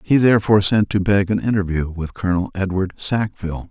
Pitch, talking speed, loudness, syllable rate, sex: 95 Hz, 180 wpm, -19 LUFS, 6.0 syllables/s, male